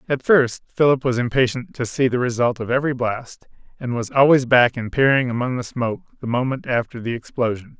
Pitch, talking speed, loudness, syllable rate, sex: 125 Hz, 200 wpm, -20 LUFS, 5.7 syllables/s, male